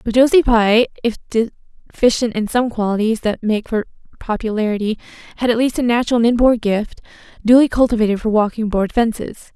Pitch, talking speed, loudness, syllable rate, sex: 225 Hz, 165 wpm, -17 LUFS, 5.6 syllables/s, female